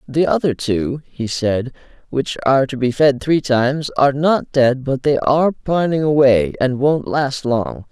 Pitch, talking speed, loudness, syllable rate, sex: 135 Hz, 180 wpm, -17 LUFS, 4.3 syllables/s, male